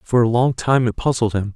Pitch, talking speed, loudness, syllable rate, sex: 120 Hz, 270 wpm, -18 LUFS, 5.5 syllables/s, male